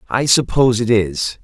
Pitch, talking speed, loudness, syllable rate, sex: 115 Hz, 165 wpm, -15 LUFS, 5.0 syllables/s, male